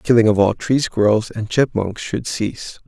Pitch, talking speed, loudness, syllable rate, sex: 110 Hz, 210 wpm, -18 LUFS, 5.0 syllables/s, male